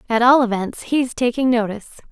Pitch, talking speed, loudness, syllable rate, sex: 240 Hz, 170 wpm, -18 LUFS, 5.9 syllables/s, female